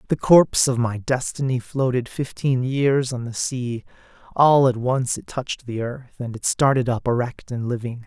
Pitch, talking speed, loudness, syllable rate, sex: 125 Hz, 185 wpm, -21 LUFS, 4.7 syllables/s, male